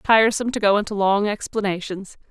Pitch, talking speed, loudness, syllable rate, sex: 205 Hz, 155 wpm, -21 LUFS, 6.0 syllables/s, female